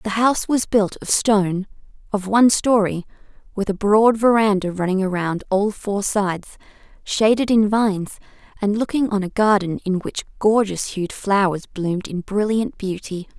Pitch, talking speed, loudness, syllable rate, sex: 205 Hz, 155 wpm, -19 LUFS, 4.8 syllables/s, female